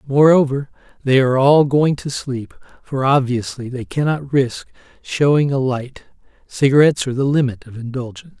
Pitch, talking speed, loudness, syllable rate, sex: 135 Hz, 150 wpm, -17 LUFS, 5.2 syllables/s, male